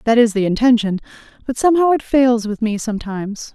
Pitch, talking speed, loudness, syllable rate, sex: 230 Hz, 185 wpm, -17 LUFS, 6.1 syllables/s, female